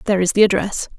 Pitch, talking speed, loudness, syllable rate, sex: 200 Hz, 245 wpm, -17 LUFS, 7.8 syllables/s, female